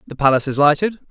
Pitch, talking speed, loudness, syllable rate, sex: 150 Hz, 220 wpm, -16 LUFS, 8.0 syllables/s, male